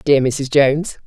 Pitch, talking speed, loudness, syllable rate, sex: 140 Hz, 170 wpm, -16 LUFS, 4.4 syllables/s, female